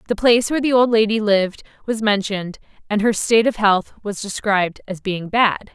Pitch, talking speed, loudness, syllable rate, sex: 210 Hz, 200 wpm, -18 LUFS, 5.7 syllables/s, female